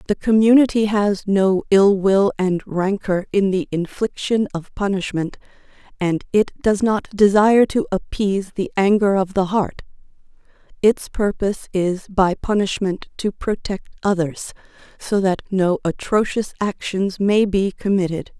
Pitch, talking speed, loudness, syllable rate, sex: 195 Hz, 135 wpm, -19 LUFS, 4.3 syllables/s, female